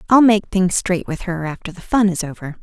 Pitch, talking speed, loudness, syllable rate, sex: 185 Hz, 250 wpm, -18 LUFS, 5.4 syllables/s, female